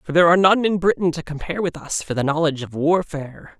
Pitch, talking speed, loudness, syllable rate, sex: 165 Hz, 250 wpm, -20 LUFS, 7.0 syllables/s, male